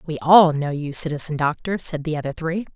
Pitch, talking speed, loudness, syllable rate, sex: 160 Hz, 220 wpm, -20 LUFS, 5.7 syllables/s, female